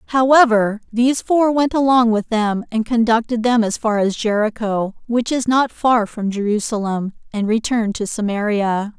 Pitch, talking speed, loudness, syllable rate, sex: 225 Hz, 160 wpm, -18 LUFS, 4.8 syllables/s, female